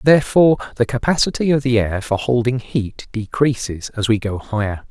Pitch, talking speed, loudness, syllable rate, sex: 120 Hz, 170 wpm, -18 LUFS, 5.3 syllables/s, male